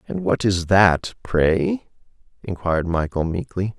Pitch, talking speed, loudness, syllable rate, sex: 90 Hz, 125 wpm, -20 LUFS, 4.0 syllables/s, male